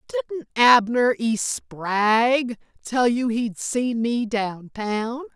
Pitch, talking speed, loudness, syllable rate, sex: 235 Hz, 125 wpm, -22 LUFS, 2.8 syllables/s, female